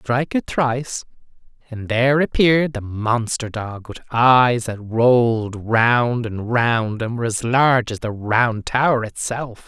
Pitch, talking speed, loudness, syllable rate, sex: 120 Hz, 155 wpm, -19 LUFS, 4.1 syllables/s, male